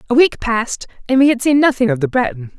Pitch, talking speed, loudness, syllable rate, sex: 255 Hz, 255 wpm, -15 LUFS, 6.5 syllables/s, female